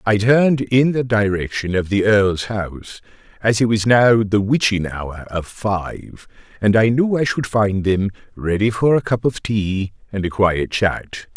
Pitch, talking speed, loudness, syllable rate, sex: 105 Hz, 185 wpm, -18 LUFS, 4.1 syllables/s, male